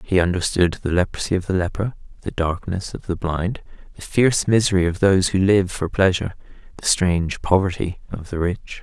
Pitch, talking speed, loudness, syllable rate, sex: 90 Hz, 185 wpm, -21 LUFS, 5.6 syllables/s, male